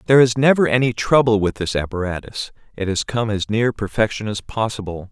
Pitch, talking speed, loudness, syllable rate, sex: 110 Hz, 190 wpm, -19 LUFS, 5.7 syllables/s, male